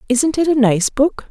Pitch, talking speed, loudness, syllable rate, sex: 265 Hz, 230 wpm, -15 LUFS, 4.6 syllables/s, female